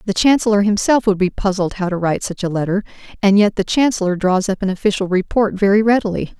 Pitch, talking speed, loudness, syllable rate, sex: 200 Hz, 215 wpm, -17 LUFS, 6.4 syllables/s, female